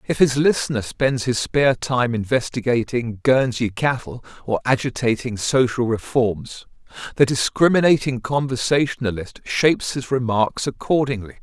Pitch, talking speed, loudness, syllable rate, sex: 125 Hz, 110 wpm, -20 LUFS, 4.7 syllables/s, male